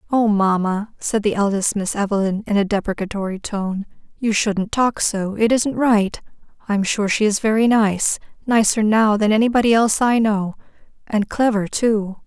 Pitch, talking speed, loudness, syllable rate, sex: 210 Hz, 150 wpm, -19 LUFS, 4.8 syllables/s, female